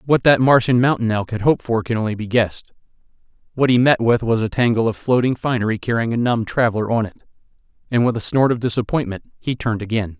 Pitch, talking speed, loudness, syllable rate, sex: 115 Hz, 220 wpm, -18 LUFS, 6.5 syllables/s, male